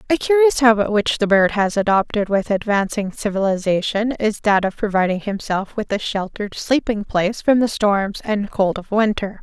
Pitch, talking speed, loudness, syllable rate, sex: 210 Hz, 180 wpm, -19 LUFS, 5.0 syllables/s, female